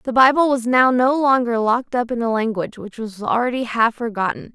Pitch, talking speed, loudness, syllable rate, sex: 240 Hz, 210 wpm, -18 LUFS, 5.6 syllables/s, female